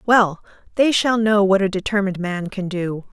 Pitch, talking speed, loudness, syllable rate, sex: 200 Hz, 190 wpm, -19 LUFS, 5.0 syllables/s, female